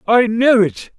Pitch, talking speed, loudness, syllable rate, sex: 225 Hz, 185 wpm, -14 LUFS, 3.8 syllables/s, male